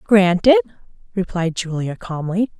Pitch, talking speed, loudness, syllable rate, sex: 195 Hz, 95 wpm, -19 LUFS, 4.3 syllables/s, female